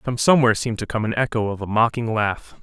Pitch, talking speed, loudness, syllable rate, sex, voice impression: 115 Hz, 250 wpm, -20 LUFS, 6.9 syllables/s, male, masculine, adult-like, slightly thick, tensed, powerful, clear, fluent, cool, intellectual, sincere, slightly calm, slightly friendly, wild, lively, slightly kind